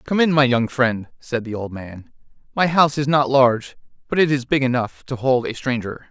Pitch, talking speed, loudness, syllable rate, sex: 130 Hz, 225 wpm, -19 LUFS, 5.2 syllables/s, male